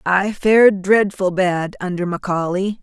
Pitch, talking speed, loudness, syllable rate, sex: 190 Hz, 125 wpm, -17 LUFS, 4.5 syllables/s, female